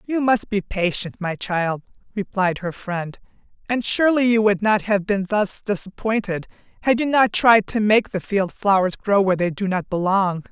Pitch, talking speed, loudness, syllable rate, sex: 200 Hz, 190 wpm, -20 LUFS, 4.8 syllables/s, female